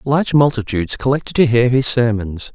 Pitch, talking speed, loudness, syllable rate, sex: 125 Hz, 165 wpm, -16 LUFS, 5.7 syllables/s, male